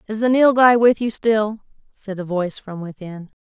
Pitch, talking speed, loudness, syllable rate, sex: 210 Hz, 195 wpm, -17 LUFS, 4.9 syllables/s, female